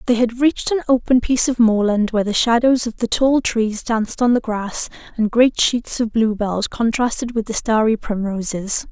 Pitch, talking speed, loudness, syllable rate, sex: 230 Hz, 190 wpm, -18 LUFS, 4.9 syllables/s, female